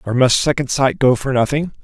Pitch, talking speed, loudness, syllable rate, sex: 130 Hz, 230 wpm, -16 LUFS, 5.6 syllables/s, male